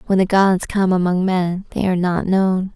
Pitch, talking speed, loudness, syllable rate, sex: 185 Hz, 220 wpm, -18 LUFS, 4.8 syllables/s, female